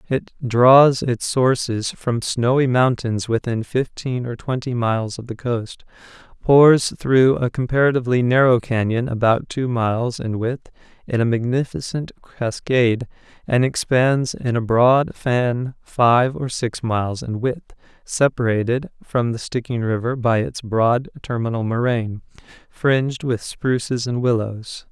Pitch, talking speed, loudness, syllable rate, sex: 120 Hz, 135 wpm, -19 LUFS, 4.2 syllables/s, male